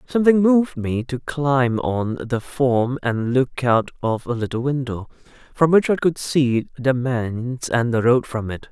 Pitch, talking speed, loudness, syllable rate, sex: 130 Hz, 185 wpm, -20 LUFS, 4.2 syllables/s, male